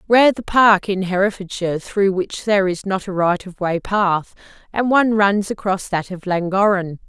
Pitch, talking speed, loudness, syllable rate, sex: 195 Hz, 185 wpm, -18 LUFS, 4.8 syllables/s, female